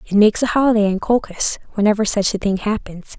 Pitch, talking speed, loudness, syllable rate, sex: 210 Hz, 205 wpm, -17 LUFS, 6.4 syllables/s, female